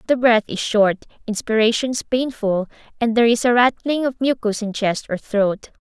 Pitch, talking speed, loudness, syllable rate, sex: 230 Hz, 175 wpm, -19 LUFS, 4.9 syllables/s, female